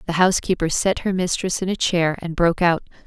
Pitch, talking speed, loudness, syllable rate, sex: 175 Hz, 215 wpm, -20 LUFS, 6.0 syllables/s, female